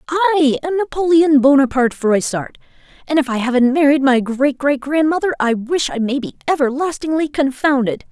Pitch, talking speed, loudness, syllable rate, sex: 280 Hz, 155 wpm, -16 LUFS, 5.0 syllables/s, female